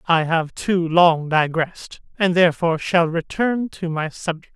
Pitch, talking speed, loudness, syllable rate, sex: 170 Hz, 160 wpm, -19 LUFS, 4.4 syllables/s, male